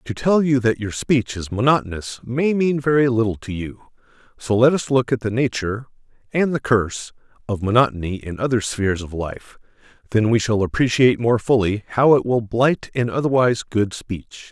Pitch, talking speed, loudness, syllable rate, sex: 120 Hz, 180 wpm, -20 LUFS, 5.3 syllables/s, male